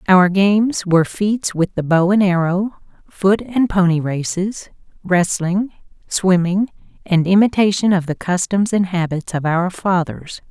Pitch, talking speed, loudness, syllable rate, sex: 185 Hz, 145 wpm, -17 LUFS, 4.2 syllables/s, female